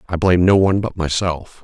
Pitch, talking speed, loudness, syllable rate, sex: 90 Hz, 220 wpm, -17 LUFS, 6.2 syllables/s, male